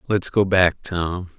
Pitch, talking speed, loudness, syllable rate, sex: 90 Hz, 175 wpm, -20 LUFS, 3.6 syllables/s, male